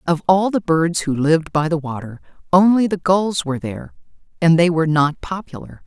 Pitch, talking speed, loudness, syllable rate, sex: 165 Hz, 195 wpm, -18 LUFS, 5.5 syllables/s, female